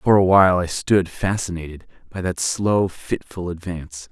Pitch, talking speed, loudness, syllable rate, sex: 90 Hz, 160 wpm, -20 LUFS, 4.7 syllables/s, male